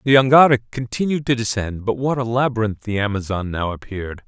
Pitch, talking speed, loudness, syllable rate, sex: 115 Hz, 180 wpm, -19 LUFS, 5.8 syllables/s, male